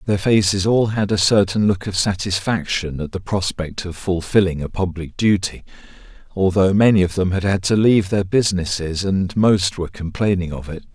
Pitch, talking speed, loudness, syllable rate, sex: 95 Hz, 180 wpm, -19 LUFS, 5.2 syllables/s, male